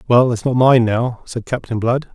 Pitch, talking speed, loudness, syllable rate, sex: 120 Hz, 225 wpm, -16 LUFS, 4.8 syllables/s, male